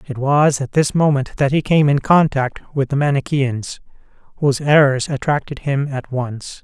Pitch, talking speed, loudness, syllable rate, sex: 140 Hz, 170 wpm, -17 LUFS, 4.7 syllables/s, male